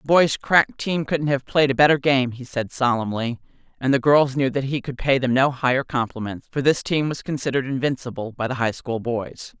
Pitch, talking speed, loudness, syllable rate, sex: 130 Hz, 225 wpm, -21 LUFS, 5.4 syllables/s, female